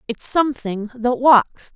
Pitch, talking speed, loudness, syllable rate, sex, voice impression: 245 Hz, 135 wpm, -18 LUFS, 3.9 syllables/s, female, very feminine, young, thin, very tensed, very powerful, very bright, hard, very clear, very fluent, slightly raspy, cute, slightly cool, slightly intellectual, very refreshing, sincere, slightly calm, slightly friendly, slightly reassuring, very unique, slightly elegant, very wild, slightly sweet, very lively, strict, very intense, sharp, very light